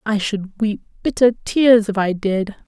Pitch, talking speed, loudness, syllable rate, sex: 210 Hz, 180 wpm, -18 LUFS, 4.1 syllables/s, female